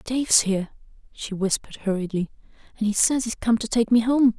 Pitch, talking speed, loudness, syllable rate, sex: 220 Hz, 190 wpm, -22 LUFS, 5.7 syllables/s, female